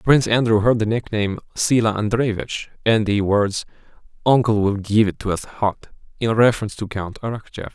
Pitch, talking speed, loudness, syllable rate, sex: 110 Hz, 170 wpm, -20 LUFS, 5.4 syllables/s, male